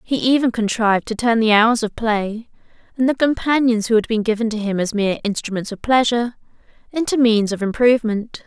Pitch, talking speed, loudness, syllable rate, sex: 225 Hz, 190 wpm, -18 LUFS, 5.7 syllables/s, female